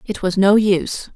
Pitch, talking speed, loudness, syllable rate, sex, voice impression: 200 Hz, 205 wpm, -16 LUFS, 4.9 syllables/s, female, very feminine, slightly young, slightly adult-like, thin, slightly tensed, slightly weak, slightly dark, hard, clear, fluent, cute, intellectual, slightly refreshing, sincere, slightly calm, friendly, reassuring, elegant, slightly sweet, slightly strict